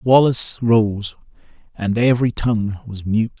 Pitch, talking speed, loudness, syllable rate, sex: 110 Hz, 125 wpm, -18 LUFS, 4.6 syllables/s, male